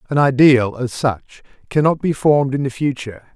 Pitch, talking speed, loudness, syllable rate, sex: 130 Hz, 180 wpm, -17 LUFS, 5.3 syllables/s, male